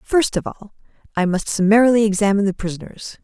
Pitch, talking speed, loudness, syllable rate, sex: 205 Hz, 165 wpm, -18 LUFS, 6.3 syllables/s, female